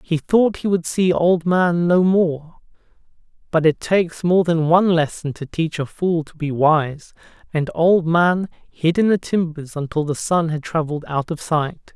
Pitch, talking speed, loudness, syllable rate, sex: 165 Hz, 190 wpm, -19 LUFS, 4.4 syllables/s, male